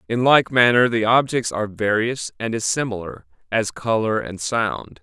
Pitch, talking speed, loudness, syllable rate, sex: 110 Hz, 155 wpm, -20 LUFS, 4.6 syllables/s, male